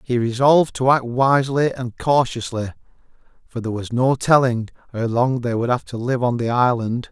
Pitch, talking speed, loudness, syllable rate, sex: 125 Hz, 185 wpm, -19 LUFS, 5.2 syllables/s, male